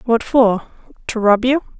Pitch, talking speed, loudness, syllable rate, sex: 235 Hz, 135 wpm, -16 LUFS, 4.2 syllables/s, female